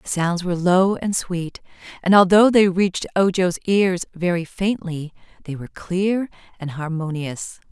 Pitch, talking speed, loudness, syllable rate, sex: 180 Hz, 150 wpm, -20 LUFS, 4.4 syllables/s, female